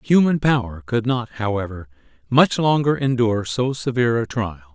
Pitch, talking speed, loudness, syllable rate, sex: 120 Hz, 150 wpm, -20 LUFS, 5.1 syllables/s, male